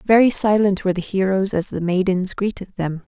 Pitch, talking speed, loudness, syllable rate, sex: 190 Hz, 190 wpm, -19 LUFS, 5.4 syllables/s, female